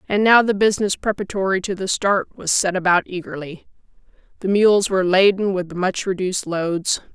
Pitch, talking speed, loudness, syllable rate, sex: 190 Hz, 175 wpm, -19 LUFS, 5.6 syllables/s, female